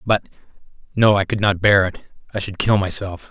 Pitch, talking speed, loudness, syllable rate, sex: 100 Hz, 200 wpm, -18 LUFS, 5.4 syllables/s, male